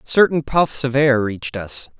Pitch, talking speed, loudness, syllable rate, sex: 130 Hz, 180 wpm, -18 LUFS, 4.4 syllables/s, male